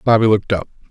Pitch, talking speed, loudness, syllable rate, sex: 105 Hz, 200 wpm, -16 LUFS, 8.1 syllables/s, male